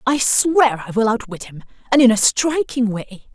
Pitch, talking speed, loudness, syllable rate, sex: 235 Hz, 180 wpm, -17 LUFS, 4.5 syllables/s, female